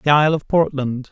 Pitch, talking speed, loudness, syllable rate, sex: 145 Hz, 215 wpm, -18 LUFS, 6.1 syllables/s, male